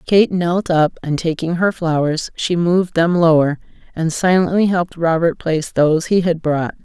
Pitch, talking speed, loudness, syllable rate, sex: 170 Hz, 175 wpm, -17 LUFS, 4.8 syllables/s, female